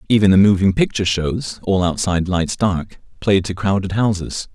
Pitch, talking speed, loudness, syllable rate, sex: 95 Hz, 170 wpm, -18 LUFS, 5.1 syllables/s, male